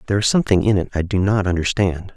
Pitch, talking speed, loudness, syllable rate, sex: 95 Hz, 250 wpm, -18 LUFS, 7.3 syllables/s, male